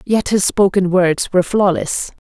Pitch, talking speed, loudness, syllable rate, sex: 190 Hz, 160 wpm, -15 LUFS, 4.4 syllables/s, female